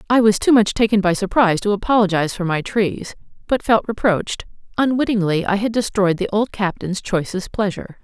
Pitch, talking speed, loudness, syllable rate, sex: 205 Hz, 180 wpm, -18 LUFS, 5.7 syllables/s, female